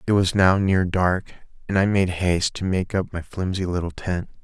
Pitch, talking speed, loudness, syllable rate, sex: 90 Hz, 215 wpm, -22 LUFS, 5.0 syllables/s, male